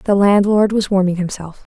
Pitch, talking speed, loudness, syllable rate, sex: 195 Hz, 170 wpm, -15 LUFS, 5.0 syllables/s, female